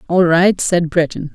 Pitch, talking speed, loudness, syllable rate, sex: 170 Hz, 180 wpm, -15 LUFS, 4.3 syllables/s, female